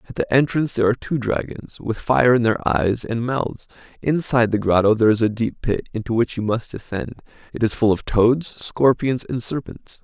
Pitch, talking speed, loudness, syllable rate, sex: 115 Hz, 210 wpm, -20 LUFS, 5.4 syllables/s, male